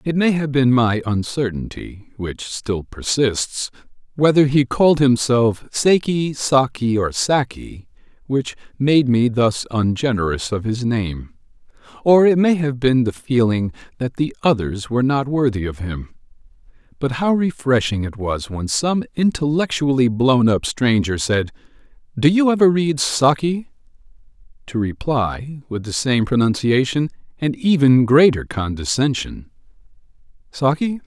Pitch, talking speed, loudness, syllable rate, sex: 130 Hz, 130 wpm, -18 LUFS, 4.2 syllables/s, male